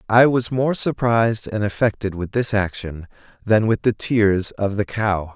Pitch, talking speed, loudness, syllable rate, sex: 105 Hz, 180 wpm, -20 LUFS, 4.4 syllables/s, male